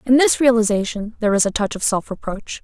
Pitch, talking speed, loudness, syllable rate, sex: 225 Hz, 230 wpm, -18 LUFS, 6.1 syllables/s, female